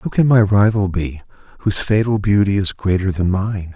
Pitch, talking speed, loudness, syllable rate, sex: 100 Hz, 210 wpm, -17 LUFS, 5.5 syllables/s, male